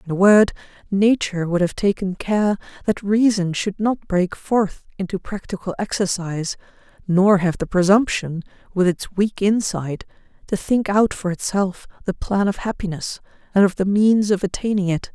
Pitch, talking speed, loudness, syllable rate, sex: 195 Hz, 160 wpm, -20 LUFS, 4.7 syllables/s, female